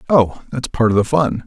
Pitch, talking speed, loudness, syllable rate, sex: 125 Hz, 205 wpm, -17 LUFS, 5.3 syllables/s, male